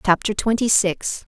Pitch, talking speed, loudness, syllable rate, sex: 205 Hz, 135 wpm, -20 LUFS, 4.3 syllables/s, female